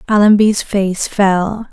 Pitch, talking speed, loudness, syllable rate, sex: 200 Hz, 105 wpm, -13 LUFS, 3.3 syllables/s, female